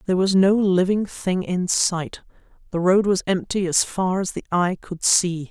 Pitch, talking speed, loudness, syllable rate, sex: 185 Hz, 195 wpm, -20 LUFS, 4.4 syllables/s, female